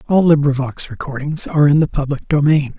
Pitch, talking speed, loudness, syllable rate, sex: 145 Hz, 170 wpm, -16 LUFS, 5.8 syllables/s, male